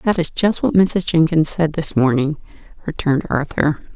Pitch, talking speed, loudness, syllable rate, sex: 160 Hz, 165 wpm, -17 LUFS, 4.9 syllables/s, female